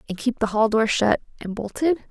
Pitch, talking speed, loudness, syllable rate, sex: 230 Hz, 230 wpm, -22 LUFS, 5.5 syllables/s, female